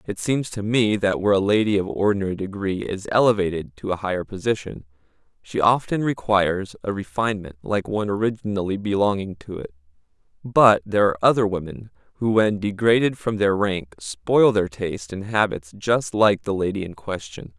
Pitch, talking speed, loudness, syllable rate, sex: 100 Hz, 170 wpm, -22 LUFS, 5.5 syllables/s, male